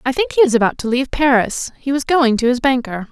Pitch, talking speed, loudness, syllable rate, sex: 255 Hz, 270 wpm, -16 LUFS, 6.1 syllables/s, female